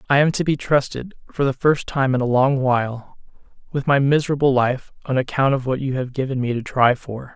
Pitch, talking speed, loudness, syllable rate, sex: 135 Hz, 230 wpm, -20 LUFS, 5.6 syllables/s, male